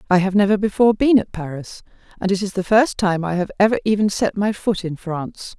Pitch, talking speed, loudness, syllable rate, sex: 195 Hz, 235 wpm, -19 LUFS, 5.9 syllables/s, female